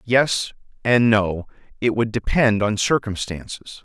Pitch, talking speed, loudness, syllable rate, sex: 110 Hz, 110 wpm, -20 LUFS, 3.9 syllables/s, male